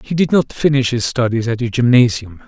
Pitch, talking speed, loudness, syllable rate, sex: 120 Hz, 220 wpm, -15 LUFS, 5.6 syllables/s, male